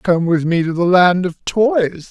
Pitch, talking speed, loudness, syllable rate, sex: 180 Hz, 230 wpm, -15 LUFS, 3.9 syllables/s, male